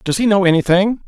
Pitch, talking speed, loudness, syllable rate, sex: 195 Hz, 225 wpm, -14 LUFS, 5.9 syllables/s, male